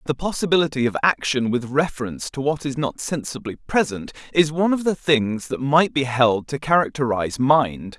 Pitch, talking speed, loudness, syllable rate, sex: 140 Hz, 180 wpm, -21 LUFS, 5.3 syllables/s, male